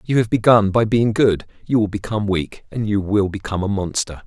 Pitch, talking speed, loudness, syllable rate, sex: 105 Hz, 225 wpm, -19 LUFS, 5.7 syllables/s, male